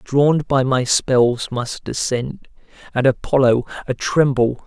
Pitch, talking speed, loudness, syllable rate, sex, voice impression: 130 Hz, 115 wpm, -18 LUFS, 3.7 syllables/s, male, masculine, adult-like, slightly tensed, slightly unique, slightly intense